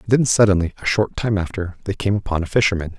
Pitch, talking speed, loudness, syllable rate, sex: 100 Hz, 240 wpm, -19 LUFS, 6.5 syllables/s, male